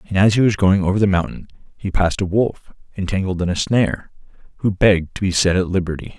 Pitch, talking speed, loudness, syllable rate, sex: 95 Hz, 225 wpm, -18 LUFS, 6.4 syllables/s, male